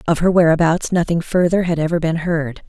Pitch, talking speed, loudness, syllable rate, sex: 165 Hz, 200 wpm, -17 LUFS, 5.6 syllables/s, female